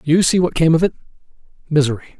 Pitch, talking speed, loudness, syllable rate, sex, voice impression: 160 Hz, 165 wpm, -16 LUFS, 7.5 syllables/s, male, masculine, middle-aged, slightly dark, slightly sincere, calm, kind